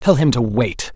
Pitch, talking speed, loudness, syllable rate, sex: 125 Hz, 250 wpm, -18 LUFS, 4.4 syllables/s, male